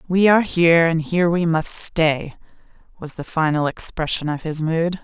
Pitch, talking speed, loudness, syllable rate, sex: 165 Hz, 180 wpm, -18 LUFS, 5.0 syllables/s, female